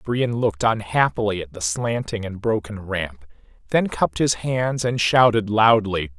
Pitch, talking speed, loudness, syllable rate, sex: 105 Hz, 155 wpm, -21 LUFS, 4.5 syllables/s, male